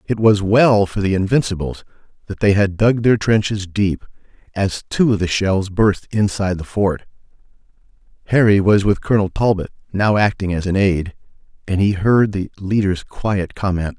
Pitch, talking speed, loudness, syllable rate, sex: 100 Hz, 165 wpm, -17 LUFS, 4.8 syllables/s, male